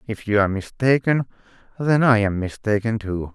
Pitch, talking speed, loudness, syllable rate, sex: 110 Hz, 145 wpm, -21 LUFS, 5.2 syllables/s, male